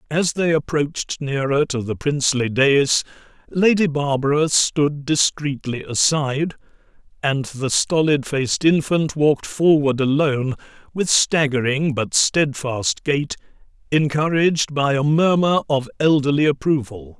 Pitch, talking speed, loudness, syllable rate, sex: 145 Hz, 115 wpm, -19 LUFS, 4.3 syllables/s, male